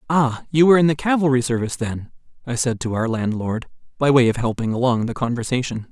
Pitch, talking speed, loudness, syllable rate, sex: 125 Hz, 205 wpm, -20 LUFS, 6.2 syllables/s, male